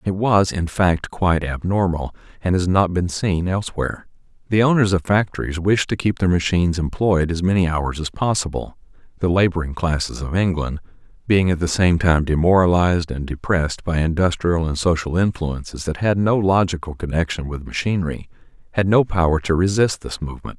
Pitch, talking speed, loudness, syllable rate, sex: 90 Hz, 170 wpm, -20 LUFS, 5.4 syllables/s, male